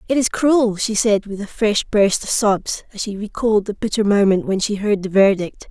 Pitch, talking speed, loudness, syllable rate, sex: 210 Hz, 230 wpm, -18 LUFS, 5.0 syllables/s, female